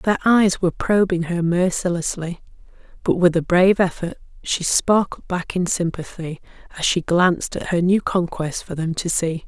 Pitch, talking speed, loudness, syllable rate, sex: 175 Hz, 170 wpm, -20 LUFS, 4.8 syllables/s, female